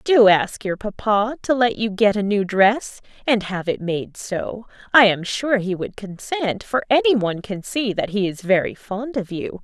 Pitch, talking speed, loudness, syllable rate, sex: 210 Hz, 210 wpm, -20 LUFS, 4.4 syllables/s, female